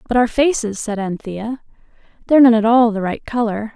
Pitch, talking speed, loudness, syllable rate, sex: 230 Hz, 190 wpm, -17 LUFS, 5.5 syllables/s, female